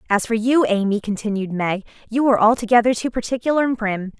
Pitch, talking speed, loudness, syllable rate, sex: 225 Hz, 185 wpm, -19 LUFS, 6.4 syllables/s, female